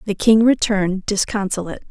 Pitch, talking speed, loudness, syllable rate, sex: 200 Hz, 125 wpm, -18 LUFS, 6.0 syllables/s, female